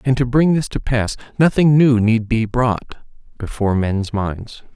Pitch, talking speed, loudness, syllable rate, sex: 120 Hz, 175 wpm, -17 LUFS, 4.5 syllables/s, male